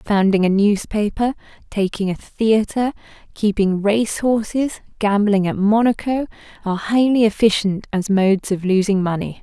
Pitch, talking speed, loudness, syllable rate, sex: 210 Hz, 125 wpm, -18 LUFS, 4.6 syllables/s, female